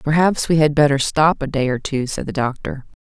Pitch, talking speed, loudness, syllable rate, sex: 145 Hz, 235 wpm, -18 LUFS, 5.4 syllables/s, female